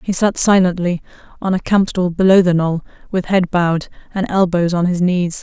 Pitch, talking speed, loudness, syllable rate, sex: 180 Hz, 190 wpm, -16 LUFS, 5.2 syllables/s, female